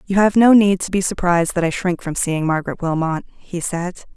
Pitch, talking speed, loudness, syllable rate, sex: 180 Hz, 230 wpm, -18 LUFS, 5.5 syllables/s, female